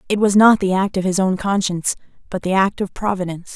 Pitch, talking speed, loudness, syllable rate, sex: 190 Hz, 235 wpm, -18 LUFS, 6.3 syllables/s, female